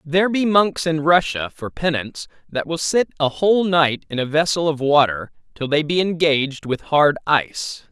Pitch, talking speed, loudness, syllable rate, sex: 155 Hz, 190 wpm, -19 LUFS, 5.0 syllables/s, male